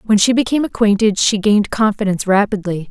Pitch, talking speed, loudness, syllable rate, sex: 210 Hz, 165 wpm, -15 LUFS, 6.4 syllables/s, female